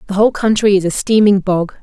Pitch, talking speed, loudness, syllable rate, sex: 200 Hz, 230 wpm, -13 LUFS, 6.3 syllables/s, female